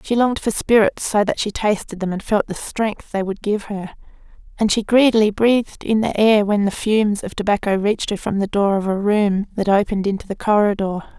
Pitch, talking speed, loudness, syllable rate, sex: 210 Hz, 225 wpm, -19 LUFS, 5.6 syllables/s, female